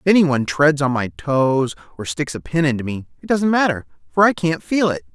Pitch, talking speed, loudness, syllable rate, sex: 145 Hz, 235 wpm, -19 LUFS, 5.5 syllables/s, male